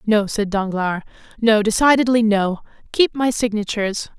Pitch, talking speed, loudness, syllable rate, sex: 215 Hz, 130 wpm, -18 LUFS, 4.8 syllables/s, female